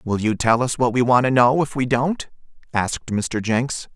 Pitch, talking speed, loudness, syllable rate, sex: 125 Hz, 230 wpm, -20 LUFS, 4.6 syllables/s, male